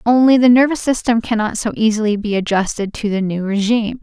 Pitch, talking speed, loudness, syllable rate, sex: 220 Hz, 195 wpm, -16 LUFS, 5.9 syllables/s, female